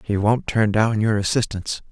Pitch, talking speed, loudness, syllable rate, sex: 110 Hz, 190 wpm, -20 LUFS, 5.1 syllables/s, male